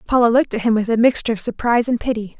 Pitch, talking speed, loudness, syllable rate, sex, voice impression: 230 Hz, 275 wpm, -18 LUFS, 8.1 syllables/s, female, feminine, slightly adult-like, tensed, cute, unique, slightly sweet, slightly lively